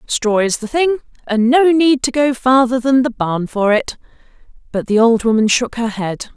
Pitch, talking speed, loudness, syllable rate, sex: 245 Hz, 210 wpm, -15 LUFS, 4.6 syllables/s, female